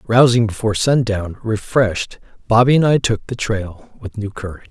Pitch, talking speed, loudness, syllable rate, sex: 110 Hz, 165 wpm, -17 LUFS, 5.4 syllables/s, male